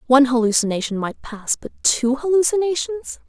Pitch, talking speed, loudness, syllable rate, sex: 275 Hz, 130 wpm, -19 LUFS, 5.3 syllables/s, female